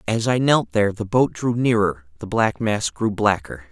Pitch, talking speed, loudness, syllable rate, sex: 110 Hz, 210 wpm, -20 LUFS, 4.8 syllables/s, male